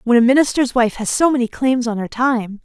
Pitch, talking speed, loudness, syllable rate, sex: 240 Hz, 250 wpm, -16 LUFS, 5.5 syllables/s, female